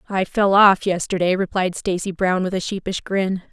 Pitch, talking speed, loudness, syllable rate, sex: 190 Hz, 190 wpm, -19 LUFS, 4.9 syllables/s, female